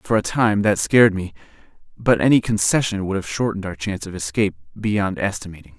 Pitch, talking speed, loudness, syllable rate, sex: 100 Hz, 185 wpm, -20 LUFS, 6.1 syllables/s, male